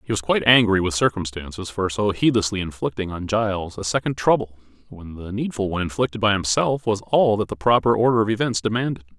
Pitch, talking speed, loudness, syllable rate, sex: 105 Hz, 205 wpm, -21 LUFS, 6.2 syllables/s, male